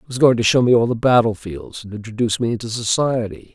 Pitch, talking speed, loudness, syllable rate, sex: 115 Hz, 255 wpm, -17 LUFS, 6.3 syllables/s, male